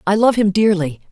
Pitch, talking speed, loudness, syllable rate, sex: 195 Hz, 215 wpm, -15 LUFS, 5.5 syllables/s, female